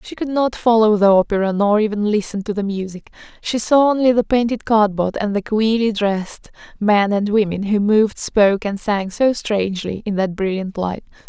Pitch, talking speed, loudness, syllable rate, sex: 210 Hz, 190 wpm, -18 LUFS, 5.1 syllables/s, female